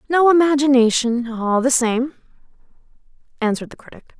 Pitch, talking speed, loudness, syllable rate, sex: 255 Hz, 115 wpm, -17 LUFS, 5.7 syllables/s, female